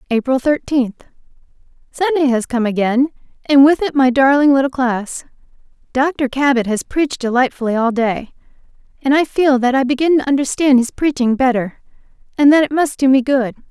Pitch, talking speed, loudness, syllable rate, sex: 265 Hz, 160 wpm, -15 LUFS, 5.3 syllables/s, female